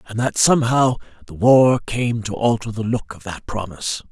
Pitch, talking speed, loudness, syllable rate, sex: 115 Hz, 190 wpm, -19 LUFS, 5.2 syllables/s, male